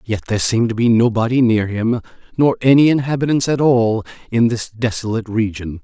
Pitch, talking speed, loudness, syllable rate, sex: 115 Hz, 175 wpm, -16 LUFS, 5.7 syllables/s, male